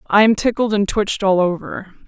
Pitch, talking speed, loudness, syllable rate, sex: 200 Hz, 205 wpm, -17 LUFS, 5.5 syllables/s, female